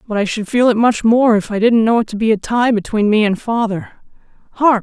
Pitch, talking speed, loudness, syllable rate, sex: 225 Hz, 250 wpm, -15 LUFS, 5.7 syllables/s, female